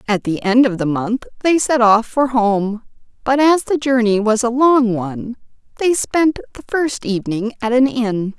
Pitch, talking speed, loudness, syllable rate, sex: 235 Hz, 195 wpm, -16 LUFS, 4.4 syllables/s, female